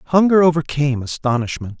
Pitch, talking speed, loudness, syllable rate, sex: 140 Hz, 100 wpm, -17 LUFS, 5.7 syllables/s, male